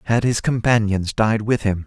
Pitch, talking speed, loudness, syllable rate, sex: 110 Hz, 195 wpm, -19 LUFS, 4.7 syllables/s, male